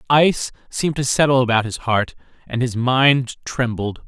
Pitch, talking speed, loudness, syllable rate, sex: 125 Hz, 160 wpm, -19 LUFS, 4.9 syllables/s, male